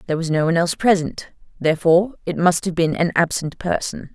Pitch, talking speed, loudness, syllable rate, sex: 170 Hz, 200 wpm, -19 LUFS, 6.5 syllables/s, female